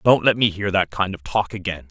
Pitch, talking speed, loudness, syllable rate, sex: 95 Hz, 285 wpm, -21 LUFS, 5.6 syllables/s, male